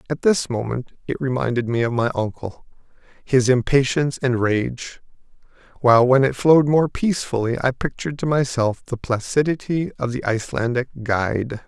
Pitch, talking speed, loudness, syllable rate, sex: 125 Hz, 150 wpm, -20 LUFS, 5.3 syllables/s, male